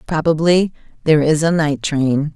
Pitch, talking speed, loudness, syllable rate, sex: 155 Hz, 155 wpm, -16 LUFS, 4.8 syllables/s, female